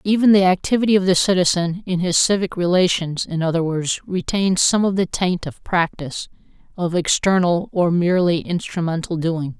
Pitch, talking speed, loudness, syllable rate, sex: 180 Hz, 165 wpm, -19 LUFS, 5.2 syllables/s, female